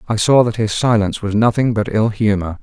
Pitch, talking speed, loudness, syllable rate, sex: 110 Hz, 230 wpm, -16 LUFS, 5.7 syllables/s, male